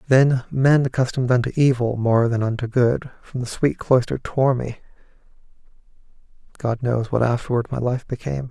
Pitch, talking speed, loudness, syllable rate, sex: 125 Hz, 155 wpm, -21 LUFS, 5.2 syllables/s, male